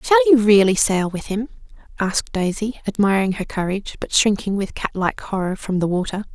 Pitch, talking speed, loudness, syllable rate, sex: 195 Hz, 190 wpm, -20 LUFS, 5.5 syllables/s, female